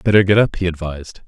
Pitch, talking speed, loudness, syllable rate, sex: 90 Hz, 235 wpm, -17 LUFS, 6.8 syllables/s, male